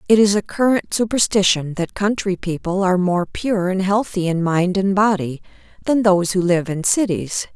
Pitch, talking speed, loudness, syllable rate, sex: 190 Hz, 185 wpm, -18 LUFS, 5.0 syllables/s, female